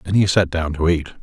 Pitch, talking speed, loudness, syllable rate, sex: 85 Hz, 295 wpm, -19 LUFS, 6.1 syllables/s, male